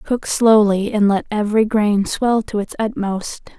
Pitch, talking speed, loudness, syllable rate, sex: 210 Hz, 165 wpm, -17 LUFS, 4.3 syllables/s, female